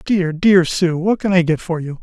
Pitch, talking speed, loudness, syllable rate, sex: 175 Hz, 265 wpm, -16 LUFS, 4.7 syllables/s, male